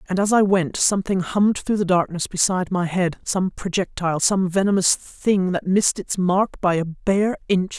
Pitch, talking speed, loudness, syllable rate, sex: 185 Hz, 195 wpm, -20 LUFS, 5.0 syllables/s, female